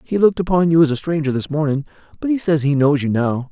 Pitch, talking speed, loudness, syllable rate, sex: 155 Hz, 275 wpm, -18 LUFS, 6.7 syllables/s, male